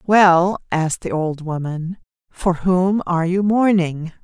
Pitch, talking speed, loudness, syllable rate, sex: 175 Hz, 140 wpm, -18 LUFS, 3.9 syllables/s, female